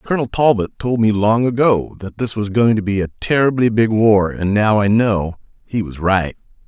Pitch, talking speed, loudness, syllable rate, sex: 110 Hz, 205 wpm, -16 LUFS, 4.9 syllables/s, male